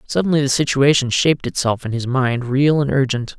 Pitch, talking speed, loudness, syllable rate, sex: 130 Hz, 195 wpm, -17 LUFS, 5.5 syllables/s, male